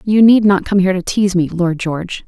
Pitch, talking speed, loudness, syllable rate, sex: 190 Hz, 265 wpm, -14 LUFS, 6.0 syllables/s, female